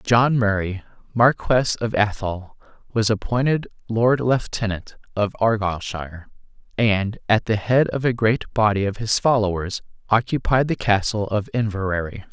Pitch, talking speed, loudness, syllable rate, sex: 110 Hz, 130 wpm, -21 LUFS, 4.6 syllables/s, male